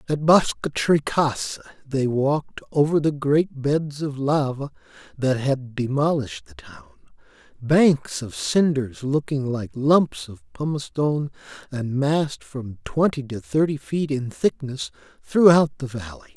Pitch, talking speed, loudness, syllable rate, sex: 140 Hz, 130 wpm, -22 LUFS, 4.2 syllables/s, male